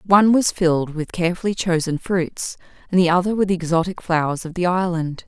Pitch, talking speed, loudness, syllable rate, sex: 175 Hz, 195 wpm, -20 LUFS, 5.8 syllables/s, female